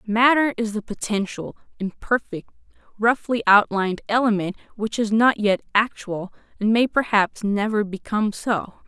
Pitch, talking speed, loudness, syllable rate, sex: 215 Hz, 130 wpm, -21 LUFS, 4.7 syllables/s, female